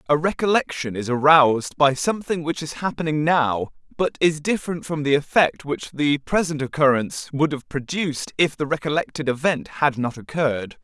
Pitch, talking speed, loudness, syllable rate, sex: 150 Hz, 165 wpm, -21 LUFS, 5.3 syllables/s, male